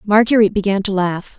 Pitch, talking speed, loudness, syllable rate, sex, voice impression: 200 Hz, 175 wpm, -16 LUFS, 6.2 syllables/s, female, very feminine, slightly young, adult-like, thin, slightly relaxed, slightly powerful, slightly bright, slightly hard, clear, very fluent, slightly raspy, very cute, slightly cool, very intellectual, refreshing, sincere, slightly calm, very friendly, reassuring, very unique, elegant, slightly wild, sweet, lively, slightly strict, intense, slightly sharp, light